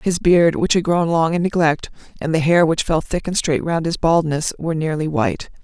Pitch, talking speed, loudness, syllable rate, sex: 165 Hz, 235 wpm, -18 LUFS, 5.3 syllables/s, female